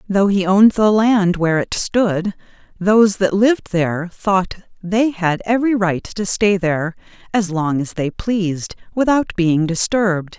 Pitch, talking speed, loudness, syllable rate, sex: 190 Hz, 160 wpm, -17 LUFS, 4.6 syllables/s, female